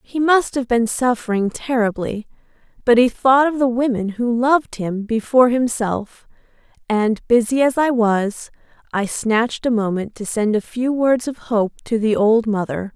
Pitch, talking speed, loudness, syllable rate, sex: 235 Hz, 170 wpm, -18 LUFS, 4.5 syllables/s, female